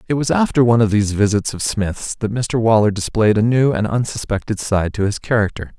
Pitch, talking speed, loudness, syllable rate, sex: 110 Hz, 220 wpm, -17 LUFS, 5.7 syllables/s, male